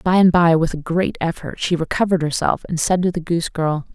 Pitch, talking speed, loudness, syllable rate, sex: 170 Hz, 245 wpm, -19 LUFS, 5.8 syllables/s, female